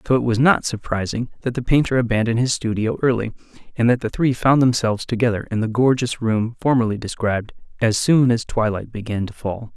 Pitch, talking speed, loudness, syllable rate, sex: 115 Hz, 195 wpm, -20 LUFS, 5.9 syllables/s, male